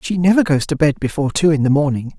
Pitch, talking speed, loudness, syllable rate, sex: 155 Hz, 275 wpm, -16 LUFS, 6.7 syllables/s, male